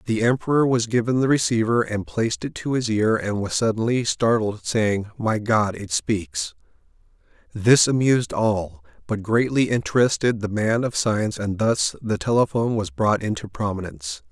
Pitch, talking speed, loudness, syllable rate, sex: 115 Hz, 165 wpm, -22 LUFS, 4.9 syllables/s, male